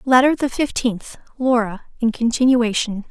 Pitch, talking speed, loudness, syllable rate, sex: 240 Hz, 115 wpm, -19 LUFS, 4.6 syllables/s, female